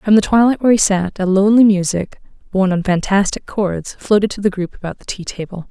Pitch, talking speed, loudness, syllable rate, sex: 195 Hz, 220 wpm, -16 LUFS, 6.0 syllables/s, female